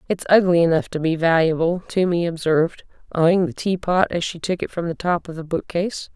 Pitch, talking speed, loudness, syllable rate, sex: 170 Hz, 205 wpm, -20 LUFS, 5.6 syllables/s, female